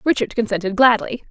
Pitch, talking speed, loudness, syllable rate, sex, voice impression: 230 Hz, 140 wpm, -18 LUFS, 6.1 syllables/s, female, very feminine, slightly adult-like, very thin, very tensed, powerful, very bright, slightly hard, very clear, very fluent, raspy, cool, intellectual, very refreshing, slightly sincere, slightly calm, slightly friendly, slightly reassuring, very unique, slightly elegant, wild, slightly sweet, very lively, very strict, very intense, sharp, light